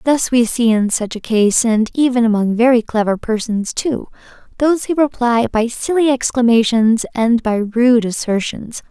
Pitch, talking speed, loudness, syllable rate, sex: 235 Hz, 160 wpm, -15 LUFS, 4.6 syllables/s, female